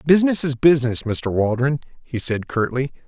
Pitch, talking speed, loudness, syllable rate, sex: 135 Hz, 155 wpm, -20 LUFS, 5.3 syllables/s, male